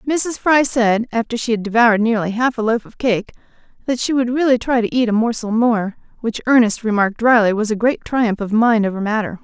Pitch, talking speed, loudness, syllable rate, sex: 230 Hz, 225 wpm, -17 LUFS, 5.6 syllables/s, female